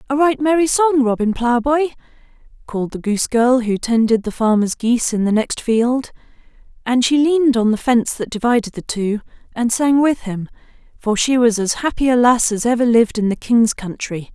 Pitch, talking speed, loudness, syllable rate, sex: 240 Hz, 195 wpm, -17 LUFS, 5.3 syllables/s, female